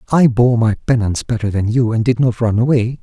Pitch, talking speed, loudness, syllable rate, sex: 115 Hz, 240 wpm, -15 LUFS, 5.8 syllables/s, male